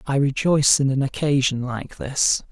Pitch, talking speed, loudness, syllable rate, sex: 135 Hz, 165 wpm, -20 LUFS, 4.7 syllables/s, male